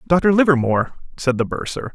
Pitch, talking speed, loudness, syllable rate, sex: 150 Hz, 155 wpm, -19 LUFS, 5.6 syllables/s, male